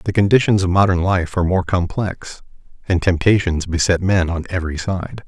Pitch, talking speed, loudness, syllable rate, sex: 90 Hz, 180 wpm, -18 LUFS, 5.6 syllables/s, male